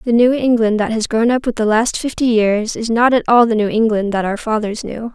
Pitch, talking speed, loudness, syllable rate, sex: 225 Hz, 270 wpm, -15 LUFS, 5.4 syllables/s, female